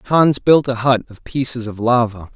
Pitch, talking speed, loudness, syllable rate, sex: 120 Hz, 205 wpm, -17 LUFS, 4.4 syllables/s, male